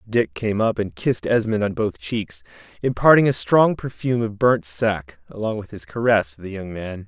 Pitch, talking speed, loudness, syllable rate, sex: 105 Hz, 205 wpm, -21 LUFS, 5.1 syllables/s, male